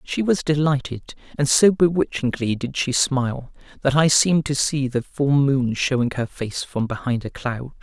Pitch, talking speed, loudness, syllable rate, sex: 135 Hz, 190 wpm, -21 LUFS, 4.7 syllables/s, male